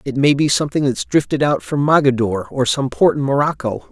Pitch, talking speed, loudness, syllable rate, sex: 135 Hz, 215 wpm, -17 LUFS, 5.9 syllables/s, male